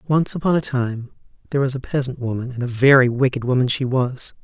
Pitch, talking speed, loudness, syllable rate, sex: 130 Hz, 215 wpm, -20 LUFS, 6.1 syllables/s, male